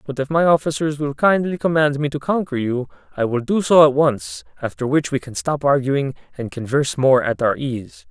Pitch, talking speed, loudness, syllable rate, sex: 140 Hz, 215 wpm, -19 LUFS, 5.2 syllables/s, male